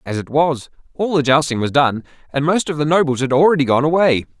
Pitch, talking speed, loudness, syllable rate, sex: 145 Hz, 230 wpm, -16 LUFS, 6.0 syllables/s, male